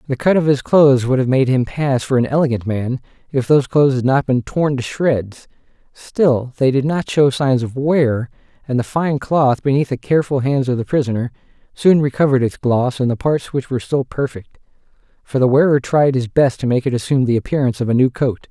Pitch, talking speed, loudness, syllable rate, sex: 135 Hz, 225 wpm, -17 LUFS, 5.6 syllables/s, male